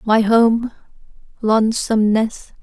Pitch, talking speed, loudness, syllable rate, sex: 220 Hz, 70 wpm, -17 LUFS, 4.0 syllables/s, female